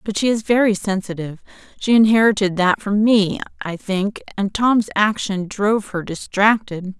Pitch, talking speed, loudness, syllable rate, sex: 205 Hz, 135 wpm, -18 LUFS, 4.7 syllables/s, female